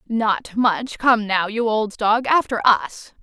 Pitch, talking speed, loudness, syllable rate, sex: 225 Hz, 170 wpm, -19 LUFS, 3.5 syllables/s, female